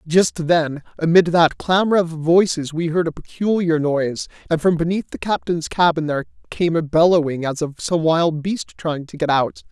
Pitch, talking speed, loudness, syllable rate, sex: 165 Hz, 190 wpm, -19 LUFS, 4.9 syllables/s, male